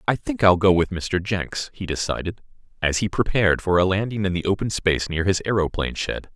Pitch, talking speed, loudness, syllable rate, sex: 95 Hz, 215 wpm, -22 LUFS, 5.8 syllables/s, male